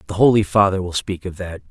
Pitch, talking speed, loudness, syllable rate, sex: 95 Hz, 245 wpm, -18 LUFS, 6.2 syllables/s, male